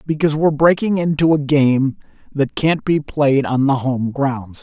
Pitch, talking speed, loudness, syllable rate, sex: 145 Hz, 180 wpm, -17 LUFS, 4.6 syllables/s, male